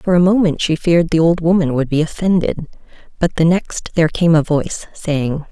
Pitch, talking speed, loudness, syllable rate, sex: 165 Hz, 205 wpm, -16 LUFS, 5.4 syllables/s, female